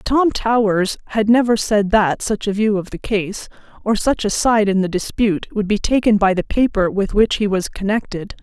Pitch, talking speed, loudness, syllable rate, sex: 210 Hz, 215 wpm, -17 LUFS, 4.9 syllables/s, female